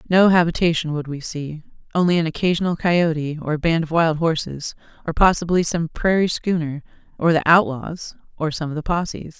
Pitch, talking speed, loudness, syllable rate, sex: 165 Hz, 180 wpm, -20 LUFS, 5.4 syllables/s, female